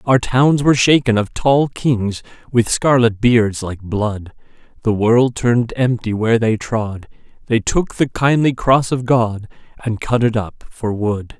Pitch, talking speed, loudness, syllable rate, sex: 115 Hz, 170 wpm, -16 LUFS, 4.0 syllables/s, male